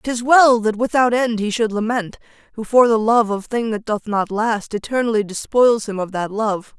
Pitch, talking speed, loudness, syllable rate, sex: 220 Hz, 210 wpm, -18 LUFS, 4.7 syllables/s, female